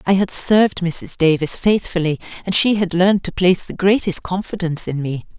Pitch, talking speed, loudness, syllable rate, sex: 180 Hz, 190 wpm, -18 LUFS, 5.5 syllables/s, female